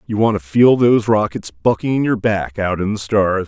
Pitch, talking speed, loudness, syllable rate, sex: 105 Hz, 240 wpm, -16 LUFS, 5.0 syllables/s, male